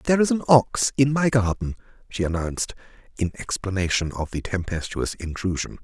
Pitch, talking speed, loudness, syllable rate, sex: 110 Hz, 155 wpm, -23 LUFS, 5.5 syllables/s, male